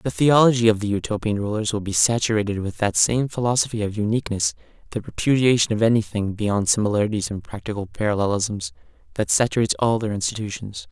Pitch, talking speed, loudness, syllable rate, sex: 110 Hz, 160 wpm, -21 LUFS, 6.3 syllables/s, male